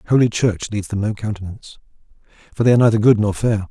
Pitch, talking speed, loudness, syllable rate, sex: 110 Hz, 210 wpm, -18 LUFS, 7.1 syllables/s, male